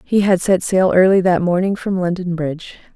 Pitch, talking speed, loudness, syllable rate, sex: 180 Hz, 205 wpm, -16 LUFS, 5.2 syllables/s, female